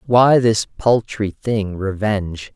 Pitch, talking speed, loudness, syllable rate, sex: 105 Hz, 115 wpm, -18 LUFS, 3.4 syllables/s, male